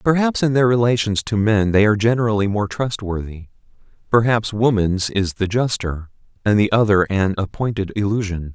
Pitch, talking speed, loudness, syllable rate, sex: 105 Hz, 145 wpm, -18 LUFS, 5.3 syllables/s, male